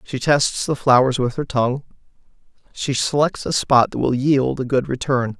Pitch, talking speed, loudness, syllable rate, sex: 130 Hz, 190 wpm, -19 LUFS, 4.8 syllables/s, male